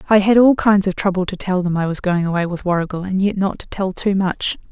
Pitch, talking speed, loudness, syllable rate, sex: 190 Hz, 280 wpm, -18 LUFS, 5.9 syllables/s, female